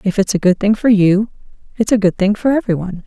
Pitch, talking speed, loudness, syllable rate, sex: 205 Hz, 255 wpm, -15 LUFS, 6.4 syllables/s, female